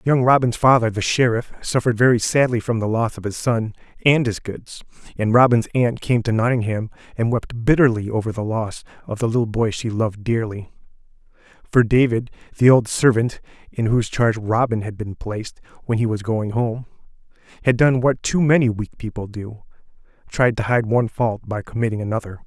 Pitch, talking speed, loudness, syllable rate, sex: 115 Hz, 185 wpm, -20 LUFS, 5.4 syllables/s, male